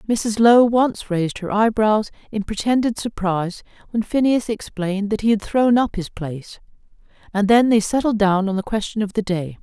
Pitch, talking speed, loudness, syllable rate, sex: 210 Hz, 185 wpm, -19 LUFS, 5.1 syllables/s, female